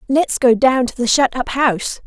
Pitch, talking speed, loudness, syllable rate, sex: 255 Hz, 235 wpm, -16 LUFS, 4.8 syllables/s, female